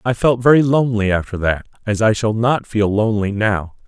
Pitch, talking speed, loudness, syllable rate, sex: 110 Hz, 200 wpm, -17 LUFS, 5.4 syllables/s, male